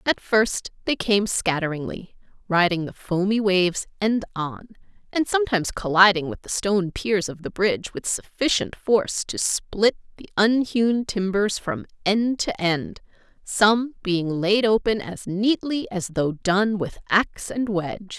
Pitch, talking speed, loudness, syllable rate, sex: 200 Hz, 150 wpm, -22 LUFS, 4.3 syllables/s, female